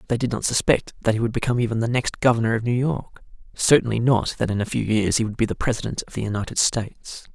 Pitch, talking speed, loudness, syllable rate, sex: 115 Hz, 255 wpm, -22 LUFS, 6.6 syllables/s, male